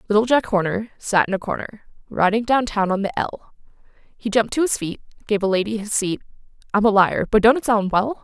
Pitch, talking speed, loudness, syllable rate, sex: 215 Hz, 225 wpm, -20 LUFS, 5.9 syllables/s, female